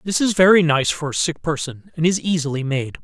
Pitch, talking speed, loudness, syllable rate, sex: 150 Hz, 235 wpm, -19 LUFS, 5.6 syllables/s, male